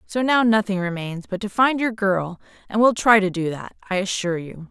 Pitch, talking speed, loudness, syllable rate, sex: 200 Hz, 230 wpm, -21 LUFS, 5.2 syllables/s, female